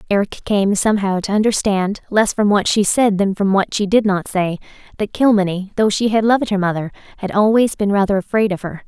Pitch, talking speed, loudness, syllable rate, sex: 200 Hz, 215 wpm, -17 LUFS, 5.6 syllables/s, female